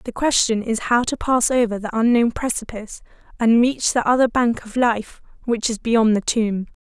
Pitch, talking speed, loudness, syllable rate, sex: 230 Hz, 195 wpm, -19 LUFS, 4.9 syllables/s, female